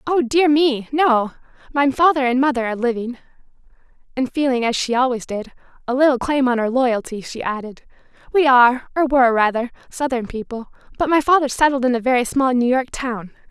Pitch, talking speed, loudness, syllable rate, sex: 255 Hz, 180 wpm, -18 LUFS, 5.7 syllables/s, female